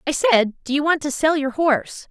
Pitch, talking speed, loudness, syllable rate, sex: 290 Hz, 255 wpm, -19 LUFS, 5.4 syllables/s, female